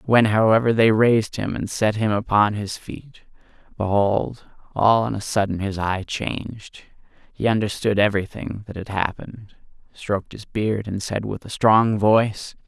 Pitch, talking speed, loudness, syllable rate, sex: 105 Hz, 160 wpm, -21 LUFS, 4.6 syllables/s, male